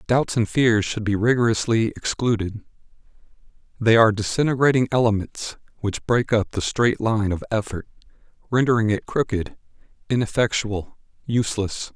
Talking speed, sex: 120 wpm, male